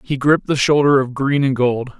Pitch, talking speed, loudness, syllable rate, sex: 135 Hz, 240 wpm, -16 LUFS, 5.4 syllables/s, male